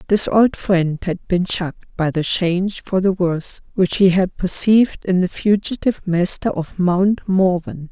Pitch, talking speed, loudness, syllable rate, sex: 185 Hz, 175 wpm, -18 LUFS, 4.4 syllables/s, female